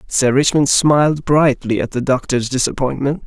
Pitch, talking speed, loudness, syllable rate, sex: 135 Hz, 145 wpm, -16 LUFS, 4.8 syllables/s, male